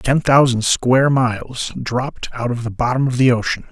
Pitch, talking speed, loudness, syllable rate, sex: 125 Hz, 195 wpm, -17 LUFS, 5.0 syllables/s, male